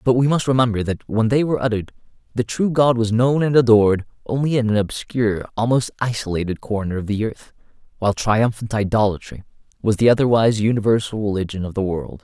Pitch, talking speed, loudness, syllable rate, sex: 115 Hz, 180 wpm, -19 LUFS, 6.2 syllables/s, male